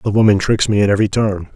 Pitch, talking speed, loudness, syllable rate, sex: 105 Hz, 270 wpm, -15 LUFS, 7.0 syllables/s, male